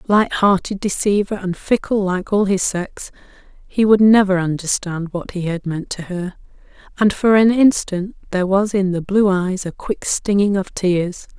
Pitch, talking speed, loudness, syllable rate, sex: 195 Hz, 175 wpm, -18 LUFS, 4.5 syllables/s, female